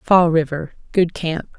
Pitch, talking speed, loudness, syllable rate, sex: 165 Hz, 115 wpm, -19 LUFS, 3.9 syllables/s, female